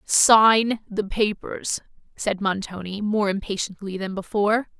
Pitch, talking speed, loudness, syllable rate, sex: 205 Hz, 115 wpm, -22 LUFS, 4.0 syllables/s, female